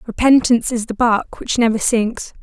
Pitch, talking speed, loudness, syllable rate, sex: 230 Hz, 175 wpm, -16 LUFS, 5.0 syllables/s, female